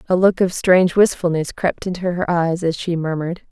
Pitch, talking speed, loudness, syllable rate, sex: 175 Hz, 205 wpm, -18 LUFS, 5.5 syllables/s, female